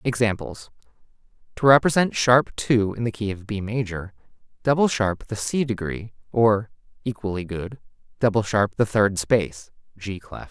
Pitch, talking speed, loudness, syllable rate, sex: 110 Hz, 150 wpm, -23 LUFS, 4.7 syllables/s, male